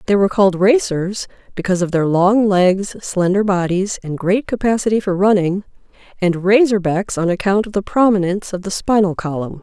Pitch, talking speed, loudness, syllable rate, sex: 195 Hz, 175 wpm, -16 LUFS, 5.4 syllables/s, female